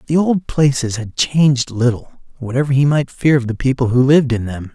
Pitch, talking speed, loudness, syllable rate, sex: 130 Hz, 215 wpm, -16 LUFS, 5.4 syllables/s, male